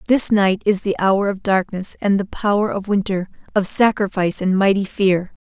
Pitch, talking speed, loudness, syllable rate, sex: 195 Hz, 190 wpm, -18 LUFS, 5.0 syllables/s, female